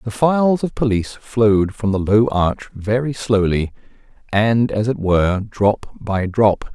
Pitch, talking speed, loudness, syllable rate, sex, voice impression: 110 Hz, 160 wpm, -18 LUFS, 4.3 syllables/s, male, masculine, middle-aged, thick, slightly relaxed, slightly powerful, clear, slightly halting, cool, intellectual, calm, slightly mature, friendly, reassuring, wild, lively, slightly kind